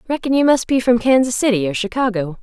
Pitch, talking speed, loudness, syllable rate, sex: 235 Hz, 225 wpm, -16 LUFS, 6.3 syllables/s, female